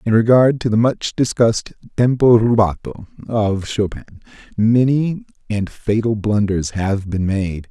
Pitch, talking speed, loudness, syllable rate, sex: 110 Hz, 130 wpm, -17 LUFS, 4.2 syllables/s, male